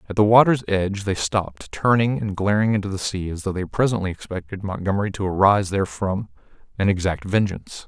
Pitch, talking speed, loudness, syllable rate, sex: 100 Hz, 185 wpm, -21 LUFS, 6.1 syllables/s, male